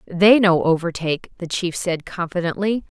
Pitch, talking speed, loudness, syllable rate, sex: 180 Hz, 140 wpm, -20 LUFS, 5.0 syllables/s, female